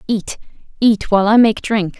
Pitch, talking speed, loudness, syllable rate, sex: 215 Hz, 180 wpm, -15 LUFS, 4.9 syllables/s, female